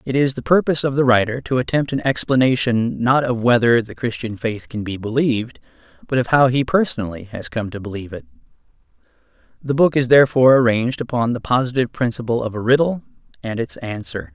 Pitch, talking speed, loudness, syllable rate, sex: 125 Hz, 190 wpm, -18 LUFS, 6.2 syllables/s, male